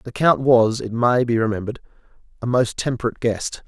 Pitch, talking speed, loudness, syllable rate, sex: 120 Hz, 180 wpm, -20 LUFS, 5.8 syllables/s, male